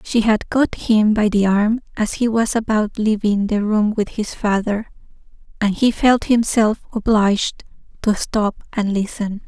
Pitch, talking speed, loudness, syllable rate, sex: 215 Hz, 165 wpm, -18 LUFS, 4.2 syllables/s, female